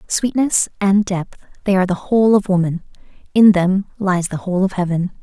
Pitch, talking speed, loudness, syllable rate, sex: 195 Hz, 185 wpm, -17 LUFS, 5.5 syllables/s, female